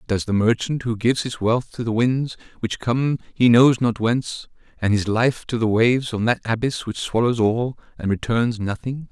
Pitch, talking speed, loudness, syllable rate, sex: 115 Hz, 205 wpm, -21 LUFS, 4.8 syllables/s, male